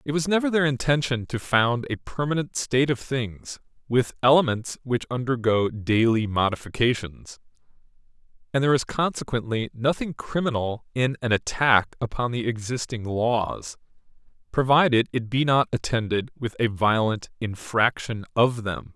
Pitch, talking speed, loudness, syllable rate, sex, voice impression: 125 Hz, 135 wpm, -24 LUFS, 4.7 syllables/s, male, masculine, adult-like, slightly thick, cool, slightly intellectual, slightly friendly